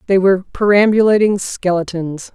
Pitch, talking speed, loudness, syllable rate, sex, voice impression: 190 Hz, 105 wpm, -14 LUFS, 5.3 syllables/s, female, feminine, adult-like, slightly fluent, intellectual, slightly strict